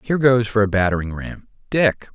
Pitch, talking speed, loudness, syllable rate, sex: 110 Hz, 195 wpm, -19 LUFS, 5.6 syllables/s, male